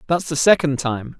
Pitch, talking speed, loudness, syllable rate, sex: 150 Hz, 200 wpm, -18 LUFS, 5.0 syllables/s, male